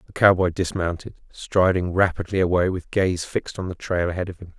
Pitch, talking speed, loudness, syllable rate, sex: 90 Hz, 195 wpm, -22 LUFS, 5.6 syllables/s, male